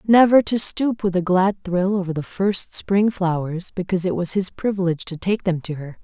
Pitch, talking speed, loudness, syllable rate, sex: 185 Hz, 220 wpm, -20 LUFS, 5.2 syllables/s, female